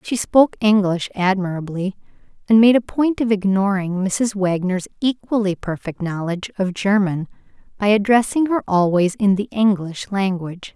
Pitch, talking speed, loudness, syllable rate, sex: 200 Hz, 140 wpm, -19 LUFS, 4.9 syllables/s, female